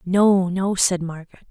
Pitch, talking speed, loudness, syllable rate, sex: 185 Hz, 160 wpm, -19 LUFS, 4.3 syllables/s, female